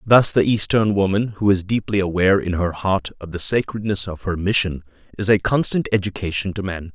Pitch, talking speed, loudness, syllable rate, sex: 100 Hz, 200 wpm, -20 LUFS, 5.5 syllables/s, male